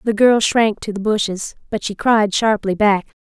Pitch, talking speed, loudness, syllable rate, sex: 210 Hz, 205 wpm, -17 LUFS, 4.6 syllables/s, female